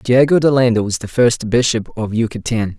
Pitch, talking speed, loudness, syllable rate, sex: 115 Hz, 195 wpm, -16 LUFS, 5.1 syllables/s, male